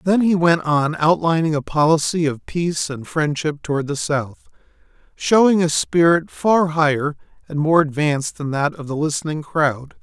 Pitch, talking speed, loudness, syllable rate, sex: 155 Hz, 160 wpm, -19 LUFS, 4.8 syllables/s, male